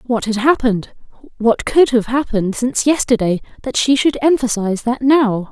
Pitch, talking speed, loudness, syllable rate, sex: 245 Hz, 150 wpm, -16 LUFS, 5.3 syllables/s, female